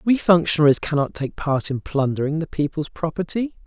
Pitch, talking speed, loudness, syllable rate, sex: 160 Hz, 165 wpm, -21 LUFS, 5.5 syllables/s, male